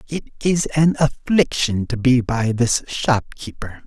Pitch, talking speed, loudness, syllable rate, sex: 130 Hz, 140 wpm, -19 LUFS, 3.7 syllables/s, male